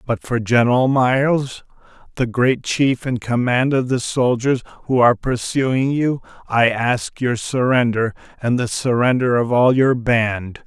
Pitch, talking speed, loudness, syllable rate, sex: 125 Hz, 150 wpm, -18 LUFS, 4.2 syllables/s, male